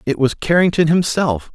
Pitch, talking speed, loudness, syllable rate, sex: 160 Hz, 155 wpm, -16 LUFS, 4.9 syllables/s, male